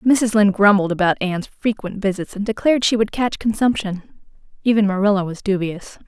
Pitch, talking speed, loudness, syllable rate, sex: 205 Hz, 170 wpm, -19 LUFS, 5.7 syllables/s, female